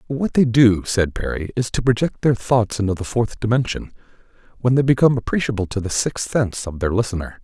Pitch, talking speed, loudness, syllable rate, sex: 115 Hz, 200 wpm, -20 LUFS, 5.8 syllables/s, male